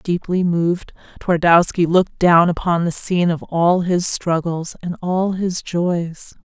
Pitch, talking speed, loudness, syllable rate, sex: 175 Hz, 150 wpm, -18 LUFS, 4.1 syllables/s, female